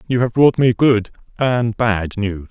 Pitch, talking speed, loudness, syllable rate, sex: 115 Hz, 190 wpm, -17 LUFS, 3.9 syllables/s, male